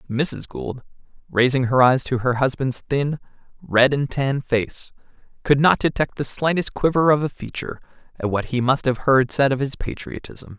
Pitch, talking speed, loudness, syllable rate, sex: 135 Hz, 180 wpm, -21 LUFS, 4.8 syllables/s, male